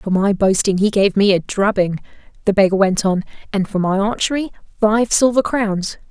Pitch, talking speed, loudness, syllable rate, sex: 200 Hz, 185 wpm, -17 LUFS, 5.1 syllables/s, female